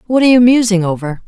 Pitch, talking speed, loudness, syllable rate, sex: 215 Hz, 235 wpm, -11 LUFS, 7.3 syllables/s, female